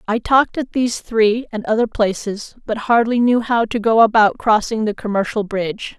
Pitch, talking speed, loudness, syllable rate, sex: 220 Hz, 190 wpm, -17 LUFS, 5.1 syllables/s, female